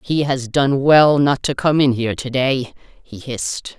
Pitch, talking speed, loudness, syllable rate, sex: 135 Hz, 205 wpm, -17 LUFS, 4.3 syllables/s, female